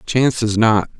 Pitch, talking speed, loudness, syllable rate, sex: 110 Hz, 180 wpm, -16 LUFS, 5.0 syllables/s, male